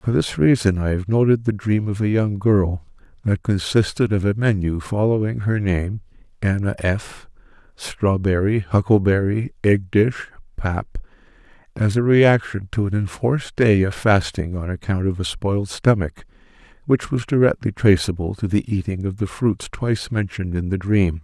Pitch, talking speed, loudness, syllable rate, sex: 100 Hz, 160 wpm, -20 LUFS, 4.5 syllables/s, male